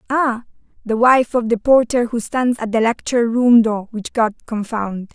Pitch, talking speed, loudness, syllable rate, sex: 230 Hz, 185 wpm, -17 LUFS, 4.6 syllables/s, female